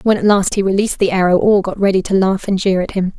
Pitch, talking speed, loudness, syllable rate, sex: 195 Hz, 300 wpm, -15 LUFS, 6.5 syllables/s, female